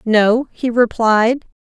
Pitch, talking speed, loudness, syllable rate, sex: 230 Hz, 110 wpm, -15 LUFS, 2.9 syllables/s, female